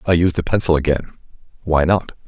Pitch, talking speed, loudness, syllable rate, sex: 80 Hz, 185 wpm, -18 LUFS, 6.1 syllables/s, male